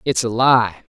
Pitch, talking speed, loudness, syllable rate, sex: 115 Hz, 180 wpm, -17 LUFS, 4.0 syllables/s, male